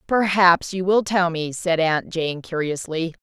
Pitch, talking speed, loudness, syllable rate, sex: 175 Hz, 165 wpm, -20 LUFS, 4.0 syllables/s, female